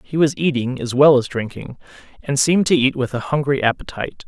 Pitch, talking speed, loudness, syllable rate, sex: 135 Hz, 210 wpm, -18 LUFS, 5.9 syllables/s, male